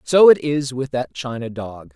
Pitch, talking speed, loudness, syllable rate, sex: 130 Hz, 215 wpm, -18 LUFS, 4.3 syllables/s, male